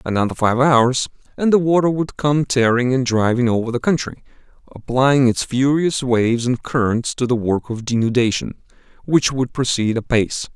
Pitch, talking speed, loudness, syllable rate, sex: 125 Hz, 165 wpm, -18 LUFS, 5.0 syllables/s, male